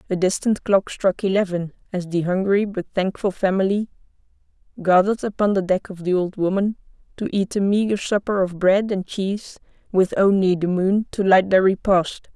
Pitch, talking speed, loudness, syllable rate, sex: 195 Hz, 175 wpm, -20 LUFS, 5.1 syllables/s, female